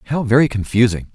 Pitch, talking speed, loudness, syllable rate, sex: 125 Hz, 155 wpm, -16 LUFS, 6.5 syllables/s, male